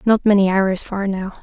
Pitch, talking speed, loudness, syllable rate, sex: 195 Hz, 210 wpm, -17 LUFS, 4.9 syllables/s, female